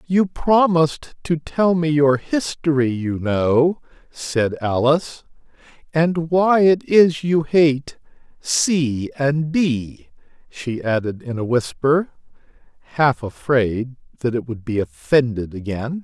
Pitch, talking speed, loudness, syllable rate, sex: 140 Hz, 120 wpm, -19 LUFS, 3.5 syllables/s, male